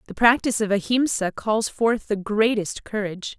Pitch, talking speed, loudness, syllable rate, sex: 215 Hz, 160 wpm, -22 LUFS, 5.1 syllables/s, female